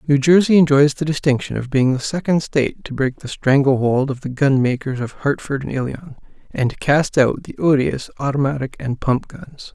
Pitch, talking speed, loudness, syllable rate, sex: 140 Hz, 195 wpm, -18 LUFS, 5.0 syllables/s, male